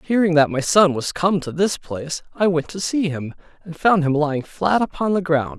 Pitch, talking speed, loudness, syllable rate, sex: 165 Hz, 235 wpm, -20 LUFS, 5.1 syllables/s, male